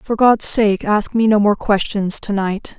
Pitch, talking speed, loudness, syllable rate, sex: 210 Hz, 215 wpm, -16 LUFS, 4.0 syllables/s, female